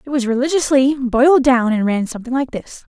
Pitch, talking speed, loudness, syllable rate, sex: 255 Hz, 205 wpm, -16 LUFS, 5.9 syllables/s, female